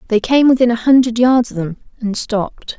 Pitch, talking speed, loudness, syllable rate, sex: 235 Hz, 215 wpm, -14 LUFS, 5.5 syllables/s, female